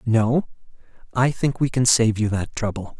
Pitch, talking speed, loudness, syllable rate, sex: 120 Hz, 180 wpm, -21 LUFS, 4.5 syllables/s, male